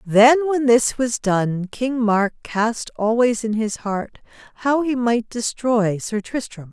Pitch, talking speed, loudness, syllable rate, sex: 230 Hz, 160 wpm, -20 LUFS, 3.5 syllables/s, female